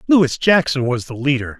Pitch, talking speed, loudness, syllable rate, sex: 140 Hz, 190 wpm, -17 LUFS, 4.9 syllables/s, male